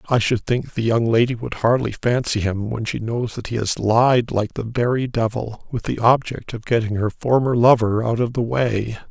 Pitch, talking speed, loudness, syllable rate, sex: 115 Hz, 215 wpm, -20 LUFS, 4.8 syllables/s, male